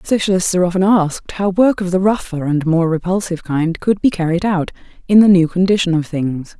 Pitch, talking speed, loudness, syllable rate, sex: 180 Hz, 210 wpm, -16 LUFS, 5.7 syllables/s, female